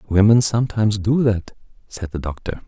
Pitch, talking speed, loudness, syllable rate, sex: 105 Hz, 155 wpm, -19 LUFS, 5.6 syllables/s, male